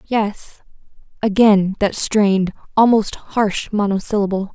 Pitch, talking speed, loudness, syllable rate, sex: 205 Hz, 90 wpm, -17 LUFS, 4.1 syllables/s, female